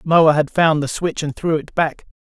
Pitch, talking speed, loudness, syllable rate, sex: 155 Hz, 235 wpm, -18 LUFS, 4.5 syllables/s, male